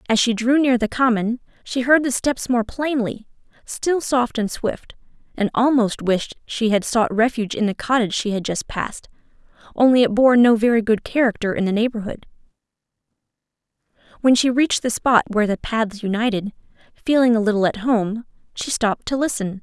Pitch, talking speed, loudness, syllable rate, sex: 230 Hz, 175 wpm, -19 LUFS, 5.4 syllables/s, female